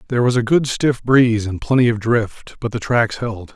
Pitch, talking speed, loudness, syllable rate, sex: 115 Hz, 235 wpm, -17 LUFS, 5.2 syllables/s, male